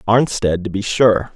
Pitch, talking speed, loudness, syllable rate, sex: 105 Hz, 175 wpm, -16 LUFS, 4.2 syllables/s, male